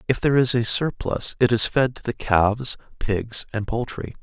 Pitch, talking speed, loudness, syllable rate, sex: 115 Hz, 200 wpm, -22 LUFS, 4.9 syllables/s, male